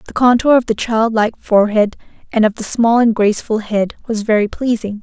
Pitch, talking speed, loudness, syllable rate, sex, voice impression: 220 Hz, 205 wpm, -15 LUFS, 5.5 syllables/s, female, feminine, slightly adult-like, slightly muffled, slightly cute, slightly refreshing, slightly sincere